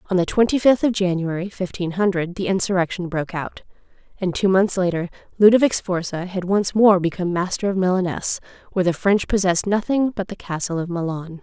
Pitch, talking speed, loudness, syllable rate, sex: 185 Hz, 185 wpm, -20 LUFS, 5.9 syllables/s, female